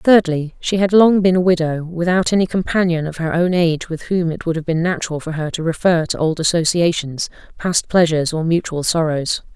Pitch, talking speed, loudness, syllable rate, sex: 170 Hz, 205 wpm, -17 LUFS, 5.5 syllables/s, female